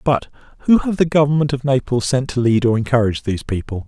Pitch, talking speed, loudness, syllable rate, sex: 130 Hz, 215 wpm, -18 LUFS, 6.5 syllables/s, male